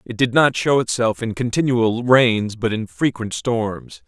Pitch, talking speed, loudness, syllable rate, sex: 120 Hz, 175 wpm, -19 LUFS, 4.1 syllables/s, male